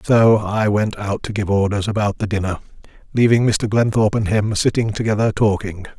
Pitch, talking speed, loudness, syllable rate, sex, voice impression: 105 Hz, 180 wpm, -18 LUFS, 5.3 syllables/s, male, masculine, adult-like, slightly tensed, powerful, clear, fluent, cool, calm, friendly, wild, kind, slightly modest